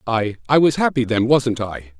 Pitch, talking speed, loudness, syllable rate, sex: 120 Hz, 180 wpm, -18 LUFS, 5.0 syllables/s, male